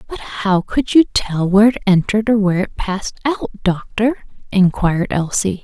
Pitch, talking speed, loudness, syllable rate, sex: 205 Hz, 170 wpm, -16 LUFS, 5.1 syllables/s, female